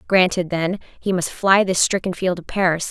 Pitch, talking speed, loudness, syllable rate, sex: 185 Hz, 205 wpm, -19 LUFS, 4.9 syllables/s, female